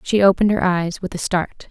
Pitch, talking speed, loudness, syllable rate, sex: 190 Hz, 245 wpm, -19 LUFS, 5.6 syllables/s, female